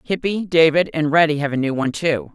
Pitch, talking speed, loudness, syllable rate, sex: 160 Hz, 230 wpm, -18 LUFS, 5.8 syllables/s, female